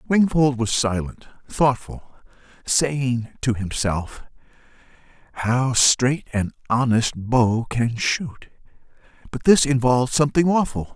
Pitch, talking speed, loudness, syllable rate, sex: 125 Hz, 95 wpm, -20 LUFS, 3.8 syllables/s, male